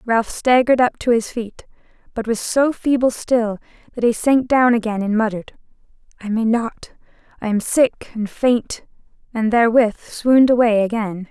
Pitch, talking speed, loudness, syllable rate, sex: 230 Hz, 165 wpm, -18 LUFS, 4.8 syllables/s, female